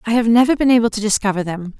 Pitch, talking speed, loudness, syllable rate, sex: 220 Hz, 265 wpm, -16 LUFS, 7.2 syllables/s, female